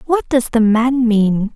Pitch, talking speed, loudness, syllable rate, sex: 230 Hz, 190 wpm, -15 LUFS, 3.6 syllables/s, female